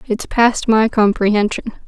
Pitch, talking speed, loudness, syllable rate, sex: 220 Hz, 130 wpm, -15 LUFS, 4.4 syllables/s, female